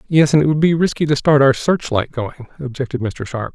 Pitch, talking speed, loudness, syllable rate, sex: 140 Hz, 235 wpm, -17 LUFS, 5.4 syllables/s, male